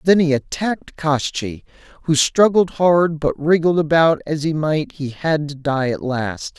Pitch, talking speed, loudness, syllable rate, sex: 150 Hz, 175 wpm, -18 LUFS, 4.2 syllables/s, male